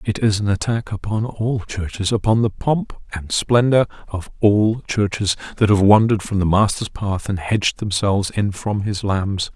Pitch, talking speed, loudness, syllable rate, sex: 105 Hz, 180 wpm, -19 LUFS, 4.7 syllables/s, male